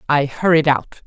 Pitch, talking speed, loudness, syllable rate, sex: 145 Hz, 170 wpm, -17 LUFS, 4.5 syllables/s, female